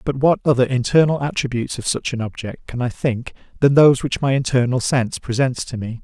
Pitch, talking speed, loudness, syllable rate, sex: 130 Hz, 210 wpm, -19 LUFS, 5.9 syllables/s, male